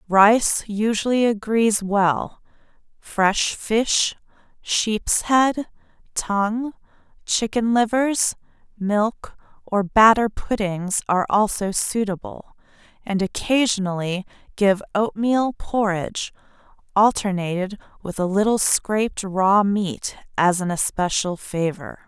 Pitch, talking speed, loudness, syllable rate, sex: 205 Hz, 90 wpm, -21 LUFS, 3.6 syllables/s, female